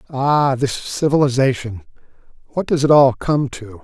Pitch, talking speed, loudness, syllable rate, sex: 135 Hz, 140 wpm, -17 LUFS, 4.6 syllables/s, male